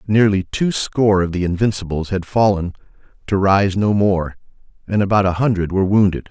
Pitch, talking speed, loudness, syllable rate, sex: 95 Hz, 170 wpm, -17 LUFS, 5.4 syllables/s, male